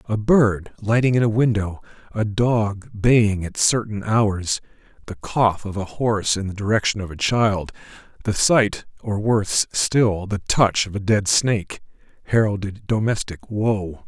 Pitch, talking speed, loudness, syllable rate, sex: 105 Hz, 160 wpm, -20 LUFS, 4.2 syllables/s, male